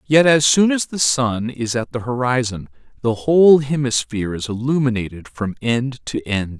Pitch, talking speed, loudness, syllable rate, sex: 125 Hz, 175 wpm, -18 LUFS, 4.8 syllables/s, male